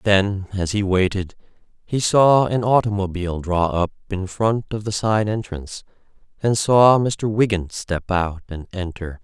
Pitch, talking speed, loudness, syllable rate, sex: 100 Hz, 155 wpm, -20 LUFS, 4.3 syllables/s, male